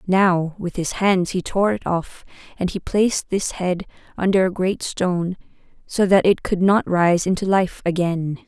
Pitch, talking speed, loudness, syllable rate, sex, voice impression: 185 Hz, 185 wpm, -20 LUFS, 4.4 syllables/s, female, feminine, adult-like, tensed, slightly powerful, bright, soft, fluent, intellectual, calm, reassuring, kind, modest